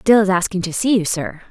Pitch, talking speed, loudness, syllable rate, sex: 190 Hz, 280 wpm, -18 LUFS, 6.0 syllables/s, female